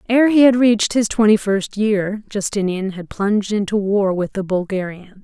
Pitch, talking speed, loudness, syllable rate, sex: 205 Hz, 185 wpm, -17 LUFS, 4.8 syllables/s, female